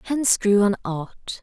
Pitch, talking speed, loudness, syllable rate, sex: 210 Hz, 170 wpm, -21 LUFS, 4.0 syllables/s, female